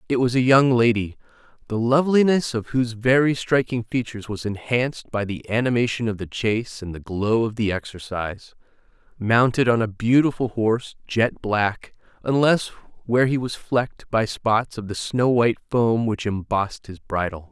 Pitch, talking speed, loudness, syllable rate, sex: 115 Hz, 170 wpm, -22 LUFS, 5.1 syllables/s, male